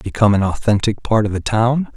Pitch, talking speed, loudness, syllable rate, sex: 110 Hz, 215 wpm, -17 LUFS, 5.8 syllables/s, male